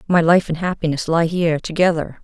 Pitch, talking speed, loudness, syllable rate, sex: 165 Hz, 190 wpm, -18 LUFS, 5.9 syllables/s, female